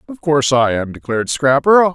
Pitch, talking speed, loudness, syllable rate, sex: 145 Hz, 185 wpm, -15 LUFS, 5.7 syllables/s, male